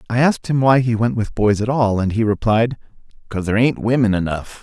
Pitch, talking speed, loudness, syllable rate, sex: 115 Hz, 235 wpm, -18 LUFS, 6.1 syllables/s, male